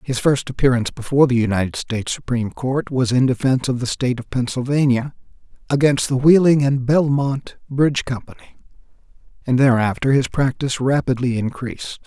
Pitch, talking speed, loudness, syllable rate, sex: 130 Hz, 150 wpm, -19 LUFS, 5.9 syllables/s, male